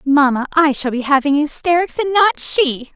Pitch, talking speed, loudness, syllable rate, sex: 300 Hz, 185 wpm, -16 LUFS, 4.7 syllables/s, female